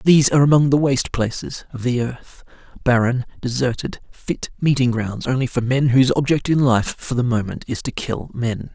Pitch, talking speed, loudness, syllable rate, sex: 125 Hz, 185 wpm, -19 LUFS, 5.3 syllables/s, male